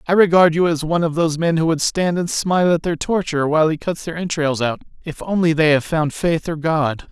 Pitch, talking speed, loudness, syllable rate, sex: 160 Hz, 255 wpm, -18 LUFS, 5.8 syllables/s, male